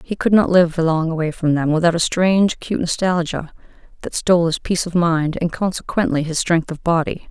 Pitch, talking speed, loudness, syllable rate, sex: 170 Hz, 215 wpm, -18 LUFS, 5.8 syllables/s, female